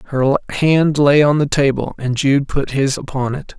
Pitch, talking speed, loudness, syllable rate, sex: 140 Hz, 200 wpm, -16 LUFS, 4.5 syllables/s, male